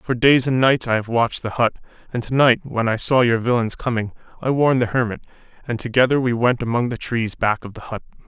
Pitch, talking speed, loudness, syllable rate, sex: 120 Hz, 230 wpm, -19 LUFS, 5.9 syllables/s, male